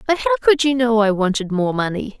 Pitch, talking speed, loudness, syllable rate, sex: 230 Hz, 245 wpm, -18 LUFS, 5.9 syllables/s, female